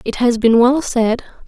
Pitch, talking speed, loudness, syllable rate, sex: 240 Hz, 205 wpm, -15 LUFS, 4.4 syllables/s, female